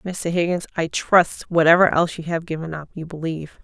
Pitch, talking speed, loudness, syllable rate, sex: 165 Hz, 200 wpm, -20 LUFS, 5.7 syllables/s, female